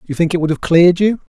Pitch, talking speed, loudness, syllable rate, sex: 170 Hz, 310 wpm, -14 LUFS, 6.9 syllables/s, male